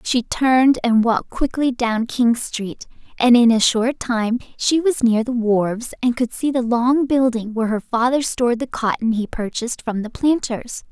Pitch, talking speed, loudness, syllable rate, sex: 240 Hz, 190 wpm, -19 LUFS, 4.6 syllables/s, female